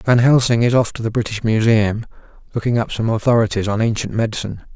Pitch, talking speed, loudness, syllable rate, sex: 115 Hz, 190 wpm, -17 LUFS, 6.4 syllables/s, male